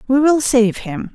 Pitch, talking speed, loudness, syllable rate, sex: 250 Hz, 210 wpm, -15 LUFS, 4.1 syllables/s, female